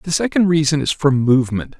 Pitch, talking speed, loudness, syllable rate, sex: 150 Hz, 200 wpm, -16 LUFS, 6.0 syllables/s, male